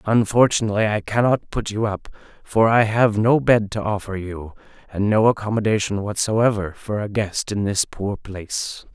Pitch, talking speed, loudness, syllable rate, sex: 105 Hz, 170 wpm, -20 LUFS, 4.8 syllables/s, male